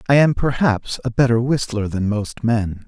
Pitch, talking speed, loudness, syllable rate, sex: 120 Hz, 190 wpm, -19 LUFS, 4.5 syllables/s, male